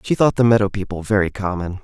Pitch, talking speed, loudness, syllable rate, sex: 100 Hz, 230 wpm, -18 LUFS, 6.4 syllables/s, male